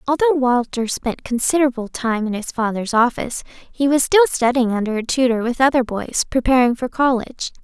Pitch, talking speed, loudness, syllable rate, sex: 245 Hz, 175 wpm, -18 LUFS, 5.6 syllables/s, female